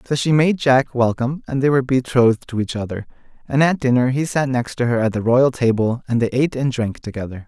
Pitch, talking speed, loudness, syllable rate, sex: 125 Hz, 235 wpm, -18 LUFS, 5.8 syllables/s, male